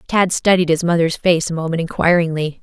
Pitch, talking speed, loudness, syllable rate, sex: 170 Hz, 185 wpm, -16 LUFS, 5.7 syllables/s, female